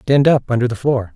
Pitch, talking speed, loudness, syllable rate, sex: 130 Hz, 260 wpm, -16 LUFS, 6.8 syllables/s, male